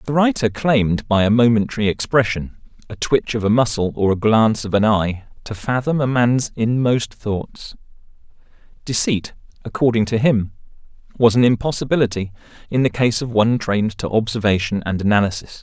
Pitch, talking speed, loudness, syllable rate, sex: 115 Hz, 155 wpm, -18 LUFS, 5.4 syllables/s, male